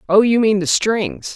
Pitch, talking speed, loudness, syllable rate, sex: 210 Hz, 220 wpm, -16 LUFS, 4.3 syllables/s, female